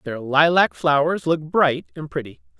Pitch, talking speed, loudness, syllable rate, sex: 140 Hz, 160 wpm, -20 LUFS, 4.5 syllables/s, male